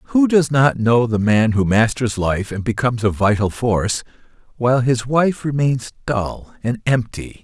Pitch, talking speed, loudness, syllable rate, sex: 120 Hz, 170 wpm, -18 LUFS, 4.4 syllables/s, male